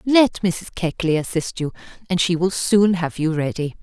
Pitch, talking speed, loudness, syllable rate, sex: 175 Hz, 190 wpm, -20 LUFS, 4.6 syllables/s, female